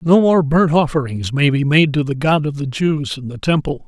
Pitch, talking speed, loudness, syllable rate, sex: 150 Hz, 250 wpm, -16 LUFS, 5.0 syllables/s, male